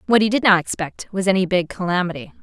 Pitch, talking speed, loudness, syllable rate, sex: 190 Hz, 220 wpm, -19 LUFS, 6.6 syllables/s, female